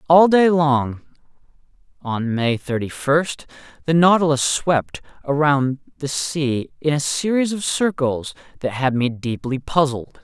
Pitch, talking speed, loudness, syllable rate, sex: 145 Hz, 135 wpm, -19 LUFS, 3.8 syllables/s, male